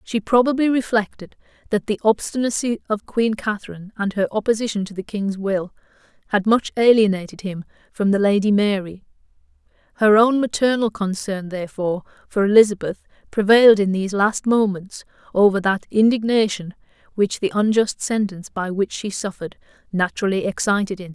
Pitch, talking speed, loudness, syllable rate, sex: 205 Hz, 145 wpm, -20 LUFS, 5.7 syllables/s, female